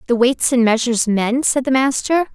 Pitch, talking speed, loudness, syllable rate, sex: 250 Hz, 205 wpm, -16 LUFS, 5.2 syllables/s, female